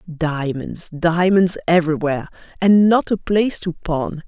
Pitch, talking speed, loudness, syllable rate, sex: 170 Hz, 125 wpm, -18 LUFS, 4.4 syllables/s, female